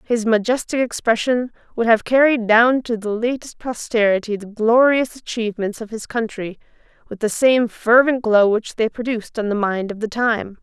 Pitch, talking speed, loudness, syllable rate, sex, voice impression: 225 Hz, 175 wpm, -18 LUFS, 4.9 syllables/s, female, feminine, adult-like, tensed, powerful, bright, slightly soft, clear, raspy, intellectual, friendly, reassuring, lively, slightly kind